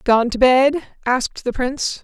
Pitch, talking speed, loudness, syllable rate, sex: 255 Hz, 175 wpm, -18 LUFS, 4.9 syllables/s, female